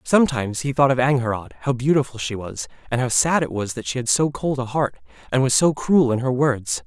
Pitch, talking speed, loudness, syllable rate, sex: 130 Hz, 245 wpm, -21 LUFS, 5.8 syllables/s, male